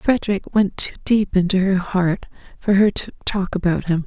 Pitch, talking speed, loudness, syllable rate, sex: 190 Hz, 190 wpm, -19 LUFS, 4.8 syllables/s, female